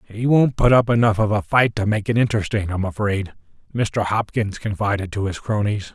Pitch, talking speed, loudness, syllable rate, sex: 105 Hz, 200 wpm, -20 LUFS, 5.5 syllables/s, male